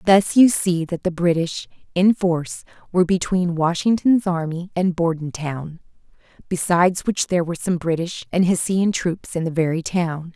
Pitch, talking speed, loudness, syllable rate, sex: 175 Hz, 155 wpm, -20 LUFS, 4.9 syllables/s, female